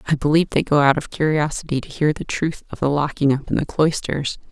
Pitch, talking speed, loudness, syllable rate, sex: 145 Hz, 240 wpm, -20 LUFS, 6.1 syllables/s, female